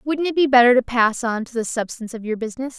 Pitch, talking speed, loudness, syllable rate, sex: 245 Hz, 280 wpm, -19 LUFS, 6.6 syllables/s, female